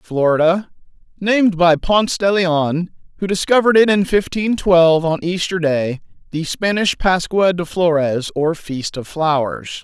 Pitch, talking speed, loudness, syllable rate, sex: 175 Hz, 140 wpm, -16 LUFS, 4.4 syllables/s, male